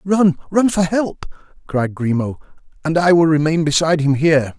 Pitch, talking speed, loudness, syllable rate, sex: 160 Hz, 170 wpm, -17 LUFS, 5.2 syllables/s, male